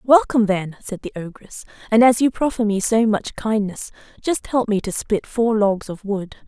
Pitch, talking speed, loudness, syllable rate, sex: 220 Hz, 205 wpm, -20 LUFS, 4.8 syllables/s, female